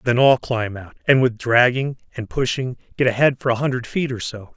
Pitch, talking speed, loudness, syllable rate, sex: 125 Hz, 225 wpm, -20 LUFS, 5.3 syllables/s, male